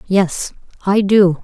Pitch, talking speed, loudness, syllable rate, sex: 190 Hz, 125 wpm, -16 LUFS, 3.0 syllables/s, female